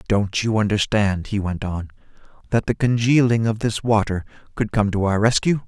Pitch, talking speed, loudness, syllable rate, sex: 105 Hz, 180 wpm, -20 LUFS, 5.0 syllables/s, male